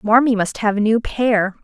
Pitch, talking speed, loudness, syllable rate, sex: 220 Hz, 220 wpm, -17 LUFS, 4.7 syllables/s, female